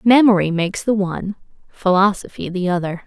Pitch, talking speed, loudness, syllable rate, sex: 195 Hz, 135 wpm, -18 LUFS, 5.8 syllables/s, female